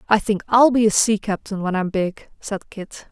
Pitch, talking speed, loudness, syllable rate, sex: 205 Hz, 230 wpm, -19 LUFS, 4.7 syllables/s, female